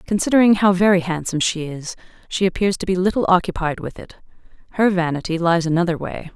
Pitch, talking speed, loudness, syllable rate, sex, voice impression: 180 Hz, 180 wpm, -19 LUFS, 6.2 syllables/s, female, very feminine, adult-like, slightly middle-aged, thin, tensed, slightly powerful, bright, hard, very clear, very fluent, cool, very intellectual, very refreshing, sincere, very calm, very friendly, very reassuring, slightly unique, elegant, slightly sweet, slightly lively, slightly sharp